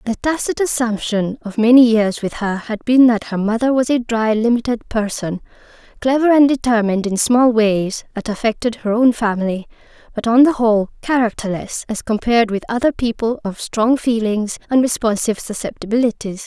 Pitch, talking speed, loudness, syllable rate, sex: 230 Hz, 165 wpm, -17 LUFS, 5.3 syllables/s, female